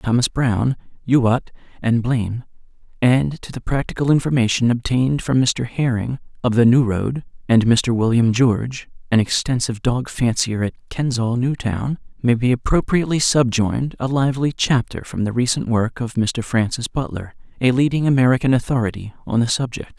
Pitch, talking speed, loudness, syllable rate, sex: 125 Hz, 155 wpm, -19 LUFS, 5.1 syllables/s, male